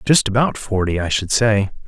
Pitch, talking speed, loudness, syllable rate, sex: 105 Hz, 195 wpm, -18 LUFS, 4.9 syllables/s, male